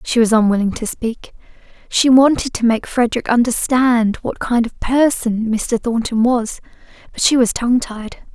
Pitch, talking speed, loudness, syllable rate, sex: 235 Hz, 160 wpm, -16 LUFS, 4.6 syllables/s, female